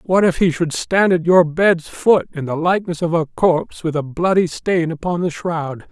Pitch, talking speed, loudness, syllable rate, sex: 170 Hz, 225 wpm, -17 LUFS, 4.7 syllables/s, male